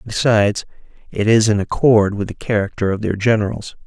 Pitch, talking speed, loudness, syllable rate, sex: 105 Hz, 170 wpm, -17 LUFS, 5.5 syllables/s, male